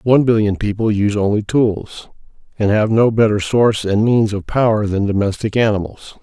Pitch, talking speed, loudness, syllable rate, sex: 105 Hz, 175 wpm, -16 LUFS, 5.4 syllables/s, male